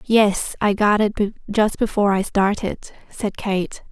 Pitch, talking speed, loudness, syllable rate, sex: 205 Hz, 155 wpm, -20 LUFS, 4.1 syllables/s, female